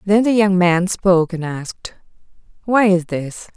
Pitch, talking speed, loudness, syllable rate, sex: 185 Hz, 170 wpm, -16 LUFS, 4.5 syllables/s, female